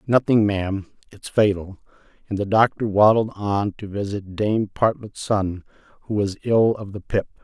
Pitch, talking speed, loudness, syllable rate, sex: 105 Hz, 160 wpm, -21 LUFS, 4.5 syllables/s, male